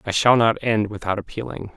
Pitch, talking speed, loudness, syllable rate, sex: 110 Hz, 205 wpm, -20 LUFS, 5.5 syllables/s, male